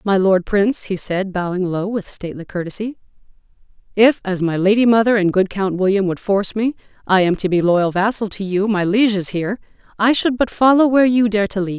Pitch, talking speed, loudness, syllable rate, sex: 200 Hz, 215 wpm, -17 LUFS, 5.7 syllables/s, female